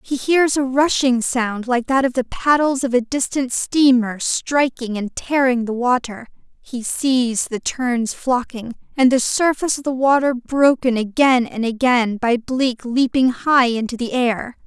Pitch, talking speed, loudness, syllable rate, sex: 250 Hz, 170 wpm, -18 LUFS, 4.1 syllables/s, female